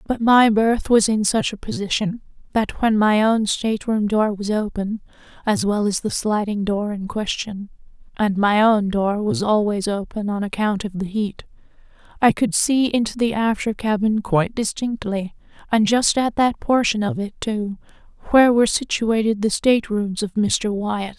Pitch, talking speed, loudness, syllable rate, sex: 210 Hz, 180 wpm, -20 LUFS, 4.0 syllables/s, female